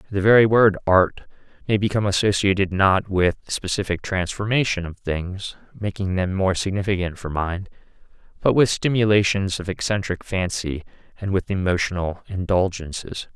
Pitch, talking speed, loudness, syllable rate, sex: 95 Hz, 130 wpm, -21 LUFS, 5.0 syllables/s, male